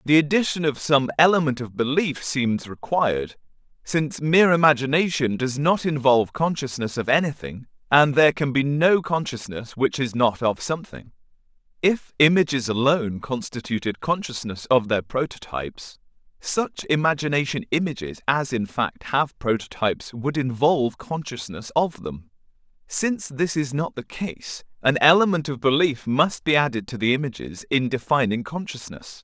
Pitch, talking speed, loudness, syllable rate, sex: 135 Hz, 140 wpm, -22 LUFS, 4.9 syllables/s, male